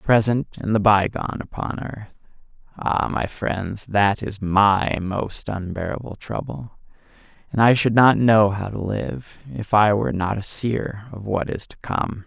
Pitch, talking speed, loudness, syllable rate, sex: 105 Hz, 160 wpm, -21 LUFS, 4.1 syllables/s, male